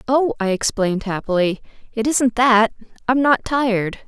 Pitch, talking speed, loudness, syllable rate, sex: 230 Hz, 160 wpm, -18 LUFS, 5.4 syllables/s, female